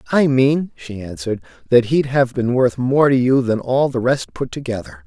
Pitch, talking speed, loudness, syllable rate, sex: 125 Hz, 215 wpm, -18 LUFS, 4.9 syllables/s, male